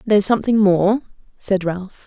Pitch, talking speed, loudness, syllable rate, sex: 200 Hz, 145 wpm, -17 LUFS, 5.1 syllables/s, female